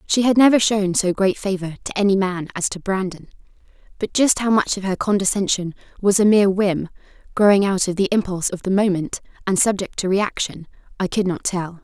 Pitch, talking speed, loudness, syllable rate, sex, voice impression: 195 Hz, 205 wpm, -19 LUFS, 5.6 syllables/s, female, very feminine, young, thin, tensed, slightly powerful, bright, slightly soft, very clear, very fluent, raspy, very cute, intellectual, very refreshing, sincere, calm, friendly, reassuring, slightly unique, elegant, wild, sweet, lively, strict, slightly intense, slightly modest